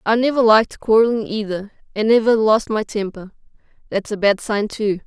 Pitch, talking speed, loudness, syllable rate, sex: 215 Hz, 165 wpm, -18 LUFS, 5.3 syllables/s, female